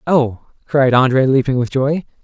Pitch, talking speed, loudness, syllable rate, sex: 135 Hz, 160 wpm, -15 LUFS, 4.6 syllables/s, male